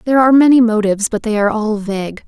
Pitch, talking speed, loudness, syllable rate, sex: 225 Hz, 235 wpm, -14 LUFS, 7.6 syllables/s, female